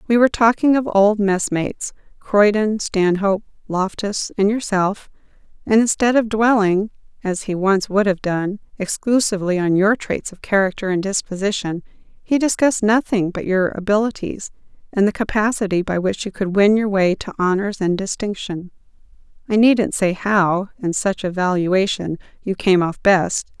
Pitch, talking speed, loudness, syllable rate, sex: 200 Hz, 155 wpm, -18 LUFS, 4.8 syllables/s, female